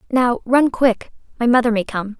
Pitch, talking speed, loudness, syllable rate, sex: 240 Hz, 190 wpm, -17 LUFS, 4.9 syllables/s, female